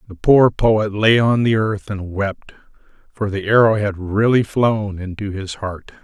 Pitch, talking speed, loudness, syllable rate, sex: 105 Hz, 180 wpm, -17 LUFS, 4.1 syllables/s, male